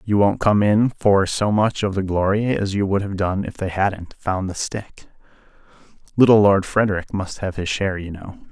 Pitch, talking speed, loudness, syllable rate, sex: 100 Hz, 210 wpm, -20 LUFS, 4.9 syllables/s, male